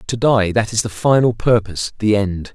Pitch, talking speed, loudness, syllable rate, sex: 110 Hz, 215 wpm, -17 LUFS, 5.1 syllables/s, male